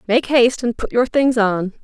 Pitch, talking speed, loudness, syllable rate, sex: 235 Hz, 230 wpm, -17 LUFS, 5.0 syllables/s, female